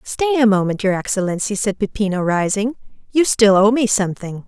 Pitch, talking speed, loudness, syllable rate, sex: 210 Hz, 175 wpm, -17 LUFS, 5.5 syllables/s, female